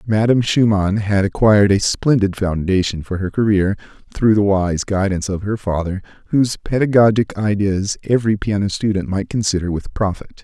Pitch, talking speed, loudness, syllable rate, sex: 100 Hz, 155 wpm, -17 LUFS, 5.3 syllables/s, male